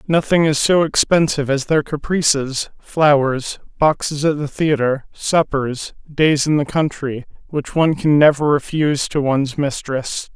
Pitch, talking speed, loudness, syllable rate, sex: 145 Hz, 145 wpm, -17 LUFS, 4.4 syllables/s, male